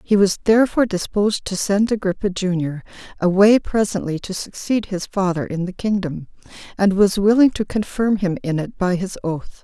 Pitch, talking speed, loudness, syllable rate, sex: 195 Hz, 175 wpm, -19 LUFS, 5.2 syllables/s, female